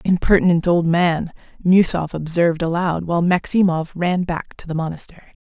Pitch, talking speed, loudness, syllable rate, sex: 170 Hz, 145 wpm, -19 LUFS, 5.4 syllables/s, female